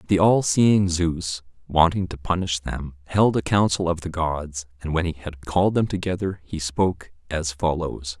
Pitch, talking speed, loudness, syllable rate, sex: 85 Hz, 185 wpm, -23 LUFS, 4.5 syllables/s, male